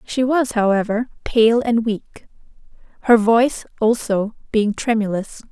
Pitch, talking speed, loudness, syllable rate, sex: 225 Hz, 120 wpm, -18 LUFS, 4.1 syllables/s, female